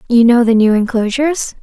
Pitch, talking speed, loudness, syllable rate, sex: 240 Hz, 185 wpm, -12 LUFS, 5.7 syllables/s, female